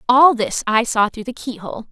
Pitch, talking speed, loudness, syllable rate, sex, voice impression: 230 Hz, 250 wpm, -17 LUFS, 4.7 syllables/s, female, feminine, slightly adult-like, clear, slightly cute, slightly sincere, slightly friendly